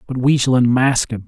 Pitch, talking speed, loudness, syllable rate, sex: 125 Hz, 235 wpm, -16 LUFS, 5.3 syllables/s, male